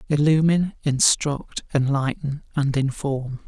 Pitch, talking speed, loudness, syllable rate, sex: 145 Hz, 85 wpm, -22 LUFS, 4.0 syllables/s, male